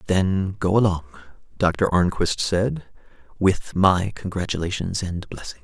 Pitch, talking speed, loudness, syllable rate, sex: 90 Hz, 115 wpm, -22 LUFS, 4.2 syllables/s, male